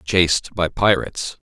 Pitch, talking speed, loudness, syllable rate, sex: 85 Hz, 120 wpm, -19 LUFS, 4.6 syllables/s, male